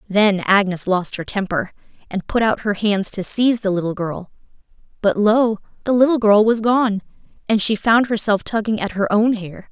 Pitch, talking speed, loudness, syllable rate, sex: 210 Hz, 190 wpm, -18 LUFS, 4.9 syllables/s, female